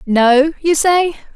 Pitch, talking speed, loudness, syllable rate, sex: 300 Hz, 135 wpm, -13 LUFS, 3.1 syllables/s, female